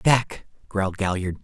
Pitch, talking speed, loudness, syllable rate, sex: 100 Hz, 125 wpm, -24 LUFS, 4.6 syllables/s, male